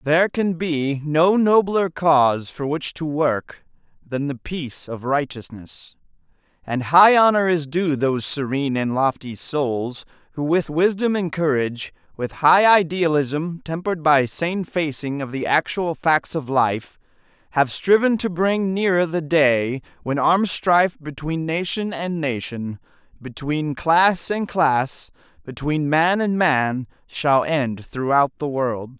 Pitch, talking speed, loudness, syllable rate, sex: 155 Hz, 145 wpm, -20 LUFS, 3.9 syllables/s, male